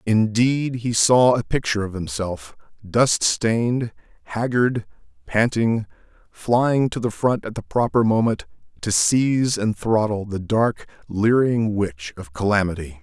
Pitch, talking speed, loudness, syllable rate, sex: 110 Hz, 135 wpm, -20 LUFS, 4.0 syllables/s, male